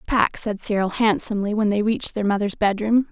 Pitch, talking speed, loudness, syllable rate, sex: 210 Hz, 195 wpm, -21 LUFS, 5.8 syllables/s, female